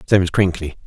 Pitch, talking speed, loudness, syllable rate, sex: 90 Hz, 210 wpm, -18 LUFS, 6.1 syllables/s, male